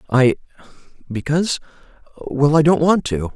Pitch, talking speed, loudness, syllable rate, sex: 145 Hz, 90 wpm, -18 LUFS, 4.9 syllables/s, male